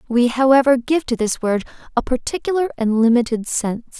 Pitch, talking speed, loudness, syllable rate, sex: 250 Hz, 165 wpm, -18 LUFS, 5.6 syllables/s, female